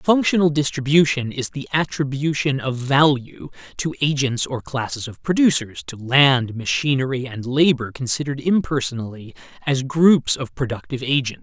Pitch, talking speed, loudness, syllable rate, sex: 135 Hz, 130 wpm, -20 LUFS, 5.0 syllables/s, male